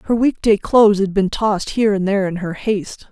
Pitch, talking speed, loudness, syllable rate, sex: 205 Hz, 250 wpm, -17 LUFS, 6.2 syllables/s, female